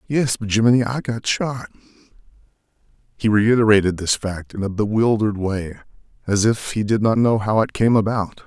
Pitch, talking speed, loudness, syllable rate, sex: 110 Hz, 165 wpm, -19 LUFS, 5.1 syllables/s, male